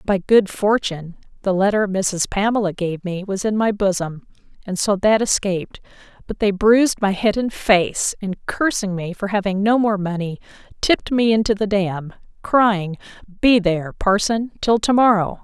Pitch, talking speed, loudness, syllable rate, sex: 200 Hz, 170 wpm, -19 LUFS, 4.7 syllables/s, female